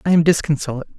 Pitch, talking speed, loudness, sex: 150 Hz, 180 wpm, -18 LUFS, male